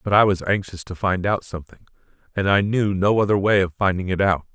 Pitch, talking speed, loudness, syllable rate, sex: 95 Hz, 240 wpm, -20 LUFS, 6.1 syllables/s, male